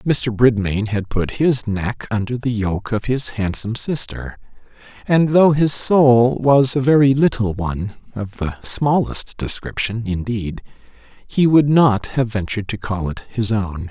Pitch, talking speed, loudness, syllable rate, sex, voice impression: 115 Hz, 150 wpm, -18 LUFS, 4.2 syllables/s, male, very masculine, very middle-aged, very thick, tensed, very powerful, dark, slightly soft, muffled, fluent, slightly raspy, cool, very intellectual, refreshing, sincere, very calm, very mature, very friendly, very reassuring, unique, elegant, very wild, sweet, slightly lively, very kind, slightly modest